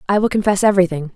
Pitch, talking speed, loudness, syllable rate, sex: 190 Hz, 210 wpm, -16 LUFS, 8.3 syllables/s, female